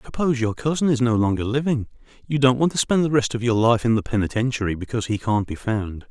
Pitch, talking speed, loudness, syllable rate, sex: 120 Hz, 245 wpm, -21 LUFS, 6.4 syllables/s, male